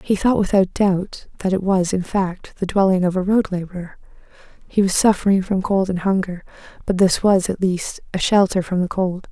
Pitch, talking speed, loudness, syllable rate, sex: 190 Hz, 205 wpm, -19 LUFS, 5.1 syllables/s, female